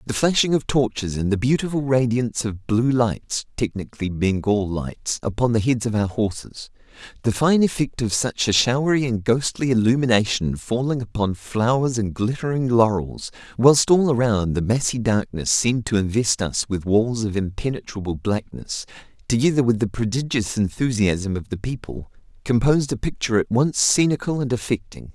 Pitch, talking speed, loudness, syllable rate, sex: 115 Hz, 160 wpm, -21 LUFS, 4.9 syllables/s, male